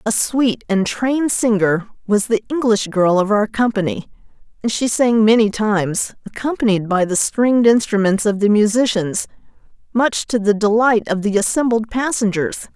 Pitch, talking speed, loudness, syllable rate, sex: 220 Hz, 155 wpm, -17 LUFS, 4.9 syllables/s, female